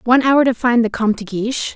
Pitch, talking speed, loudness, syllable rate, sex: 235 Hz, 275 wpm, -16 LUFS, 6.8 syllables/s, female